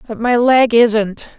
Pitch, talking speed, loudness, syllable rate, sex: 230 Hz, 175 wpm, -13 LUFS, 3.5 syllables/s, female